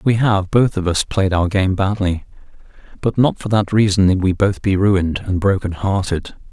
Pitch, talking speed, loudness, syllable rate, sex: 100 Hz, 200 wpm, -17 LUFS, 4.9 syllables/s, male